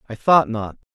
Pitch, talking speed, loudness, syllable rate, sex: 120 Hz, 190 wpm, -18 LUFS, 5.0 syllables/s, male